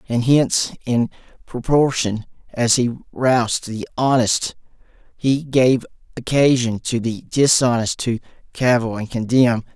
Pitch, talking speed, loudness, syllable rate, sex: 120 Hz, 115 wpm, -19 LUFS, 4.1 syllables/s, male